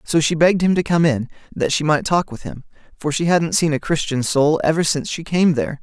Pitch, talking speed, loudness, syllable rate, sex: 155 Hz, 260 wpm, -18 LUFS, 5.8 syllables/s, male